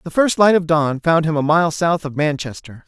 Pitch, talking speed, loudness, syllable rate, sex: 160 Hz, 250 wpm, -17 LUFS, 5.1 syllables/s, male